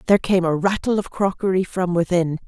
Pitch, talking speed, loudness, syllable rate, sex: 185 Hz, 195 wpm, -20 LUFS, 5.9 syllables/s, female